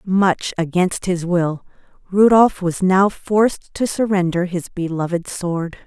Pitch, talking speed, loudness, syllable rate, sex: 185 Hz, 135 wpm, -18 LUFS, 3.9 syllables/s, female